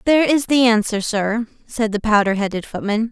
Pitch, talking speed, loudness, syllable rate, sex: 225 Hz, 190 wpm, -18 LUFS, 5.8 syllables/s, female